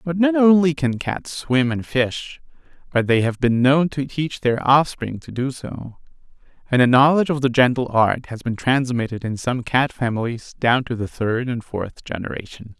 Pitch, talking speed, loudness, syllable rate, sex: 125 Hz, 190 wpm, -20 LUFS, 4.6 syllables/s, male